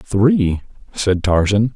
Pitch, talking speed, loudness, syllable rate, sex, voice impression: 105 Hz, 105 wpm, -17 LUFS, 3.0 syllables/s, male, very masculine, very adult-like, old, very thick, slightly tensed, very powerful, slightly bright, soft, clear, very fluent, very cool, very intellectual, sincere, very calm, very mature, very friendly, very reassuring, very unique, elegant, wild, very sweet, slightly lively, very kind, modest